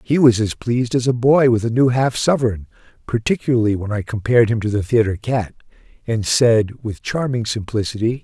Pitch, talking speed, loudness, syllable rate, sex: 115 Hz, 190 wpm, -18 LUFS, 5.5 syllables/s, male